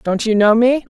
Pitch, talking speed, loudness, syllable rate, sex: 225 Hz, 250 wpm, -14 LUFS, 5.1 syllables/s, female